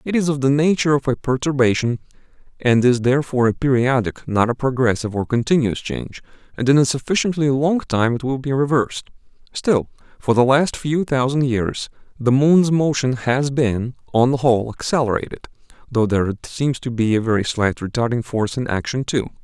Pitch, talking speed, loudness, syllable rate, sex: 130 Hz, 180 wpm, -19 LUFS, 4.7 syllables/s, male